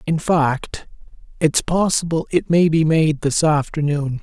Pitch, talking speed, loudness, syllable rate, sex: 155 Hz, 140 wpm, -18 LUFS, 4.0 syllables/s, male